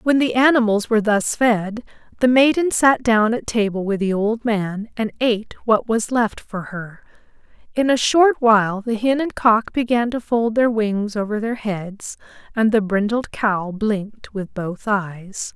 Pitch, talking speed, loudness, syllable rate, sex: 220 Hz, 180 wpm, -19 LUFS, 4.3 syllables/s, female